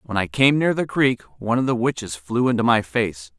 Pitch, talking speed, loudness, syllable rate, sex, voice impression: 115 Hz, 250 wpm, -21 LUFS, 5.2 syllables/s, male, very masculine, very adult-like, slightly middle-aged, very thick, tensed, powerful, bright, slightly soft, clear, fluent, cool, very intellectual, refreshing, very sincere, very calm, slightly mature, very friendly, very reassuring, slightly unique, very elegant, slightly wild, very sweet, very lively, kind, slightly modest